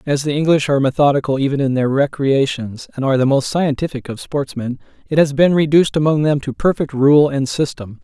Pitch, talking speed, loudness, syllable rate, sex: 140 Hz, 200 wpm, -16 LUFS, 5.8 syllables/s, male